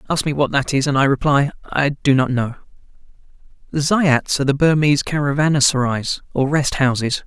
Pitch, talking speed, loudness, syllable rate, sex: 140 Hz, 175 wpm, -18 LUFS, 5.8 syllables/s, male